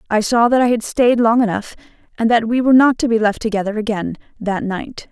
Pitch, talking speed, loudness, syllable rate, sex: 225 Hz, 235 wpm, -16 LUFS, 5.9 syllables/s, female